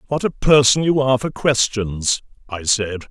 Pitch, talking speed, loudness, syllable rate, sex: 125 Hz, 175 wpm, -18 LUFS, 4.7 syllables/s, male